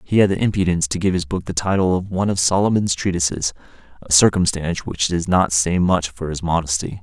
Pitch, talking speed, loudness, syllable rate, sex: 90 Hz, 215 wpm, -19 LUFS, 6.1 syllables/s, male